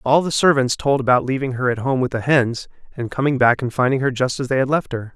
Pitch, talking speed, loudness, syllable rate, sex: 130 Hz, 280 wpm, -19 LUFS, 6.0 syllables/s, male